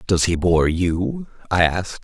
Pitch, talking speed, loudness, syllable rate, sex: 90 Hz, 175 wpm, -19 LUFS, 4.3 syllables/s, male